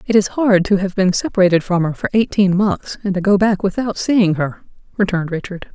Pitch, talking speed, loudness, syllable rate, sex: 195 Hz, 220 wpm, -17 LUFS, 5.6 syllables/s, female